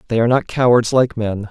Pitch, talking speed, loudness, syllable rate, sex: 115 Hz, 240 wpm, -16 LUFS, 6.1 syllables/s, male